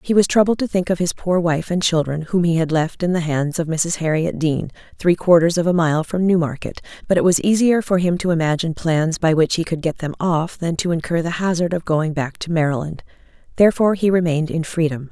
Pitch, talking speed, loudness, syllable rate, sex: 170 Hz, 240 wpm, -19 LUFS, 5.8 syllables/s, female